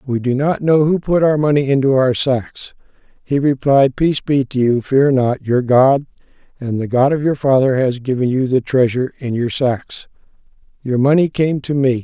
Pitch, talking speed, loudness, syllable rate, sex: 135 Hz, 200 wpm, -16 LUFS, 4.8 syllables/s, male